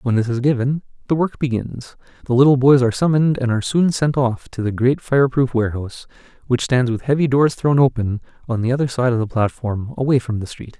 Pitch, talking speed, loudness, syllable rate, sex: 125 Hz, 230 wpm, -18 LUFS, 6.0 syllables/s, male